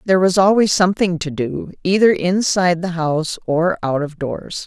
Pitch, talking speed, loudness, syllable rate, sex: 175 Hz, 180 wpm, -17 LUFS, 5.1 syllables/s, female